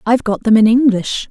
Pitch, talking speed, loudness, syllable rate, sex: 225 Hz, 230 wpm, -13 LUFS, 5.9 syllables/s, female